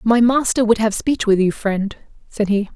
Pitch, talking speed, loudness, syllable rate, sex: 215 Hz, 220 wpm, -18 LUFS, 4.8 syllables/s, female